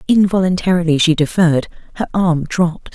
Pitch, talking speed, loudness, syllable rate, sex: 175 Hz, 120 wpm, -15 LUFS, 5.9 syllables/s, female